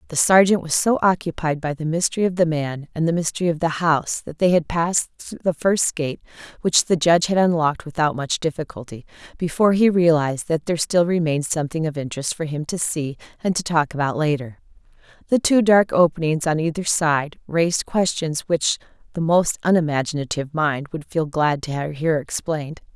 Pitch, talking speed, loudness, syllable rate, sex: 160 Hz, 185 wpm, -20 LUFS, 5.0 syllables/s, female